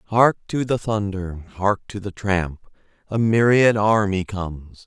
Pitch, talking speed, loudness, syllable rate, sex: 100 Hz, 135 wpm, -21 LUFS, 4.0 syllables/s, male